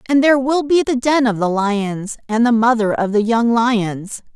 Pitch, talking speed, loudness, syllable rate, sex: 230 Hz, 220 wpm, -16 LUFS, 4.6 syllables/s, female